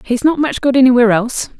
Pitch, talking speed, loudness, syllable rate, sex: 250 Hz, 225 wpm, -13 LUFS, 6.9 syllables/s, female